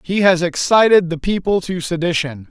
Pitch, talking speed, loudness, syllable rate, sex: 175 Hz, 165 wpm, -16 LUFS, 5.0 syllables/s, male